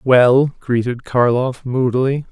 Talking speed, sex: 105 wpm, male